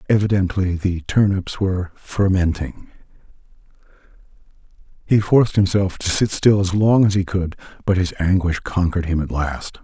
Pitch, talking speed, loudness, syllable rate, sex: 90 Hz, 140 wpm, -19 LUFS, 5.0 syllables/s, male